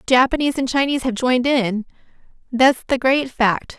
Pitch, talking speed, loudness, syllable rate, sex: 255 Hz, 175 wpm, -18 LUFS, 5.9 syllables/s, female